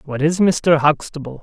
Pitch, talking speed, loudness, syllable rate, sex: 150 Hz, 170 wpm, -16 LUFS, 4.6 syllables/s, female